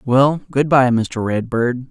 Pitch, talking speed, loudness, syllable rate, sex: 125 Hz, 155 wpm, -17 LUFS, 3.5 syllables/s, male